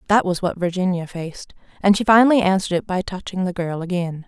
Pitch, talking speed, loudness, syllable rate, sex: 185 Hz, 210 wpm, -20 LUFS, 6.3 syllables/s, female